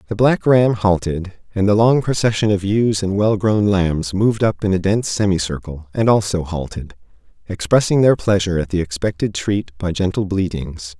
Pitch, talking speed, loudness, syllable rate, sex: 100 Hz, 180 wpm, -18 LUFS, 5.1 syllables/s, male